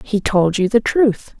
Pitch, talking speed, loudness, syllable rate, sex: 215 Hz, 215 wpm, -16 LUFS, 3.9 syllables/s, female